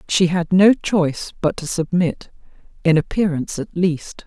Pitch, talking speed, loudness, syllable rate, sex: 170 Hz, 140 wpm, -19 LUFS, 4.6 syllables/s, female